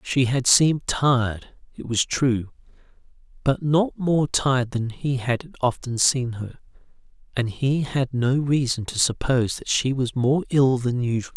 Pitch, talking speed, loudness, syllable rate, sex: 130 Hz, 165 wpm, -22 LUFS, 4.2 syllables/s, male